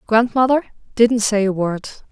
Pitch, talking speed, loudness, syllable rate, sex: 225 Hz, 140 wpm, -17 LUFS, 4.5 syllables/s, female